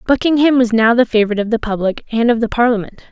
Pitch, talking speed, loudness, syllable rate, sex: 230 Hz, 230 wpm, -15 LUFS, 7.2 syllables/s, female